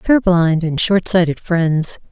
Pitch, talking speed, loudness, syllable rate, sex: 175 Hz, 140 wpm, -16 LUFS, 3.6 syllables/s, female